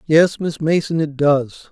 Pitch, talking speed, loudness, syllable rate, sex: 155 Hz, 175 wpm, -18 LUFS, 4.0 syllables/s, male